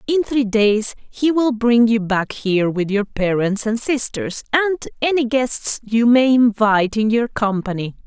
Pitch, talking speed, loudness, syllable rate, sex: 230 Hz, 170 wpm, -18 LUFS, 4.1 syllables/s, female